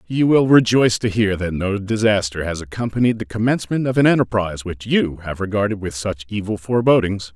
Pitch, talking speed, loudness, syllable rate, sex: 105 Hz, 190 wpm, -19 LUFS, 5.9 syllables/s, male